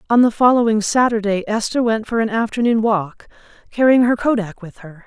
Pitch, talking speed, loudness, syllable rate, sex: 225 Hz, 180 wpm, -17 LUFS, 5.5 syllables/s, female